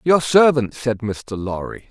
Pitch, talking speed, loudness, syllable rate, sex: 125 Hz, 155 wpm, -19 LUFS, 3.9 syllables/s, male